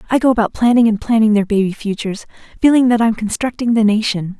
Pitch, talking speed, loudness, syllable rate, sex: 220 Hz, 205 wpm, -15 LUFS, 6.5 syllables/s, female